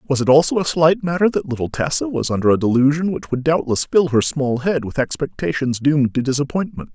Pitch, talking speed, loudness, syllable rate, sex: 145 Hz, 215 wpm, -18 LUFS, 5.8 syllables/s, male